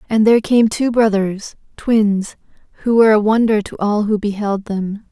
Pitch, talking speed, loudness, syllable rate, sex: 215 Hz, 175 wpm, -16 LUFS, 4.7 syllables/s, female